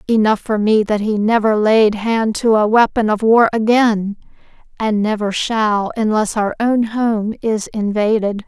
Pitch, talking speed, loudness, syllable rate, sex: 215 Hz, 165 wpm, -16 LUFS, 4.2 syllables/s, female